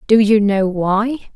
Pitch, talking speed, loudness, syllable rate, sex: 210 Hz, 175 wpm, -15 LUFS, 3.8 syllables/s, female